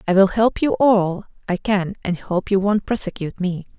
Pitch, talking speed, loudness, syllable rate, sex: 195 Hz, 205 wpm, -20 LUFS, 5.0 syllables/s, female